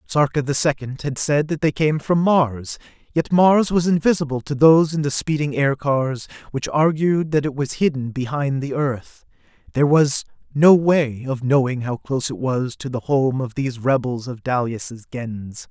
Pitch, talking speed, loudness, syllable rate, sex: 140 Hz, 185 wpm, -20 LUFS, 4.7 syllables/s, male